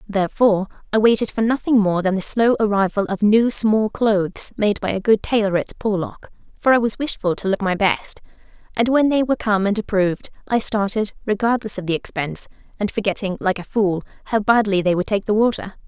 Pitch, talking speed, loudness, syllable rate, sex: 210 Hz, 205 wpm, -19 LUFS, 5.7 syllables/s, female